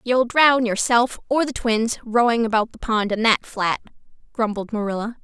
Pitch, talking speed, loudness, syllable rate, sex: 230 Hz, 170 wpm, -20 LUFS, 4.7 syllables/s, female